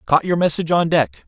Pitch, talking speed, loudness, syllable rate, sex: 165 Hz, 235 wpm, -18 LUFS, 6.1 syllables/s, male